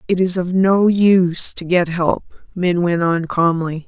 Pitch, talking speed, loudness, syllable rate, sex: 175 Hz, 185 wpm, -17 LUFS, 4.1 syllables/s, female